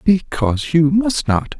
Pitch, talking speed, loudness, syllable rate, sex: 145 Hz, 150 wpm, -17 LUFS, 4.0 syllables/s, male